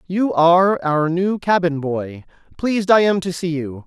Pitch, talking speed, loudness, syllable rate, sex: 170 Hz, 185 wpm, -18 LUFS, 4.5 syllables/s, male